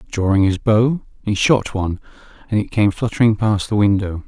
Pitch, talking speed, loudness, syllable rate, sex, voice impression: 105 Hz, 180 wpm, -18 LUFS, 5.3 syllables/s, male, masculine, middle-aged, slightly relaxed, slightly powerful, hard, slightly muffled, slightly raspy, slightly intellectual, calm, mature, slightly friendly, reassuring, wild, slightly lively, slightly strict